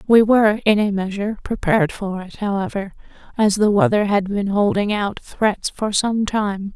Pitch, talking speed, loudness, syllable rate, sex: 205 Hz, 180 wpm, -19 LUFS, 4.8 syllables/s, female